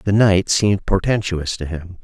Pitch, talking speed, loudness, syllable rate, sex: 95 Hz, 175 wpm, -18 LUFS, 4.6 syllables/s, male